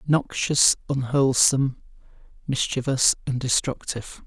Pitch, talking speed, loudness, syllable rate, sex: 130 Hz, 70 wpm, -22 LUFS, 4.6 syllables/s, male